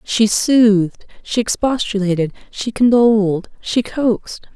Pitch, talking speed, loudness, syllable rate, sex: 215 Hz, 105 wpm, -16 LUFS, 4.3 syllables/s, female